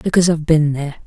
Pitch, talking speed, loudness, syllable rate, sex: 155 Hz, 225 wpm, -16 LUFS, 8.6 syllables/s, female